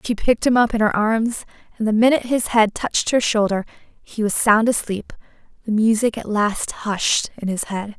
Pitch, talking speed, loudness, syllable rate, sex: 220 Hz, 205 wpm, -19 LUFS, 5.0 syllables/s, female